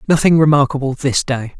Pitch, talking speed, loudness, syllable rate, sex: 140 Hz, 150 wpm, -15 LUFS, 5.8 syllables/s, male